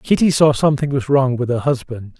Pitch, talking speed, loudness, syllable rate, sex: 135 Hz, 220 wpm, -16 LUFS, 5.6 syllables/s, male